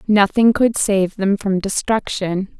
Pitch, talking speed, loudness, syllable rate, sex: 200 Hz, 140 wpm, -17 LUFS, 3.7 syllables/s, female